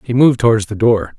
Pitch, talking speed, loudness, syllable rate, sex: 115 Hz, 255 wpm, -14 LUFS, 6.6 syllables/s, male